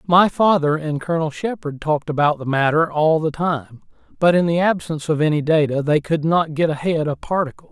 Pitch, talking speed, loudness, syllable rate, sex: 155 Hz, 200 wpm, -19 LUFS, 5.5 syllables/s, male